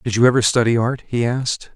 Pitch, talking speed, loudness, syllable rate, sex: 120 Hz, 240 wpm, -18 LUFS, 6.2 syllables/s, male